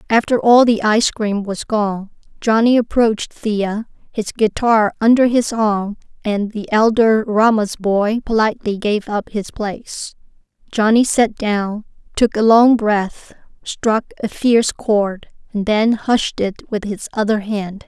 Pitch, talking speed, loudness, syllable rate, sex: 215 Hz, 150 wpm, -17 LUFS, 4.0 syllables/s, female